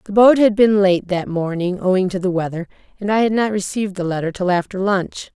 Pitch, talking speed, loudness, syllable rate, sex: 190 Hz, 235 wpm, -18 LUFS, 5.7 syllables/s, female